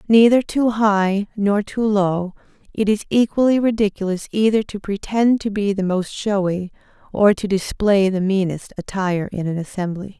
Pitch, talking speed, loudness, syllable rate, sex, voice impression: 200 Hz, 160 wpm, -19 LUFS, 4.7 syllables/s, female, very feminine, slightly young, very adult-like, relaxed, weak, slightly dark, soft, very clear, very fluent, cute, refreshing, very sincere, calm, very friendly, very reassuring, slightly unique, elegant, sweet, slightly lively, very kind, very modest, light